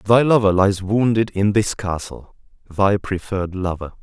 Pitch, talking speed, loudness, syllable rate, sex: 100 Hz, 135 wpm, -19 LUFS, 4.5 syllables/s, male